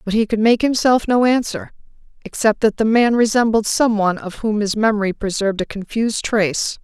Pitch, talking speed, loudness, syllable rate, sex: 215 Hz, 195 wpm, -17 LUFS, 5.7 syllables/s, female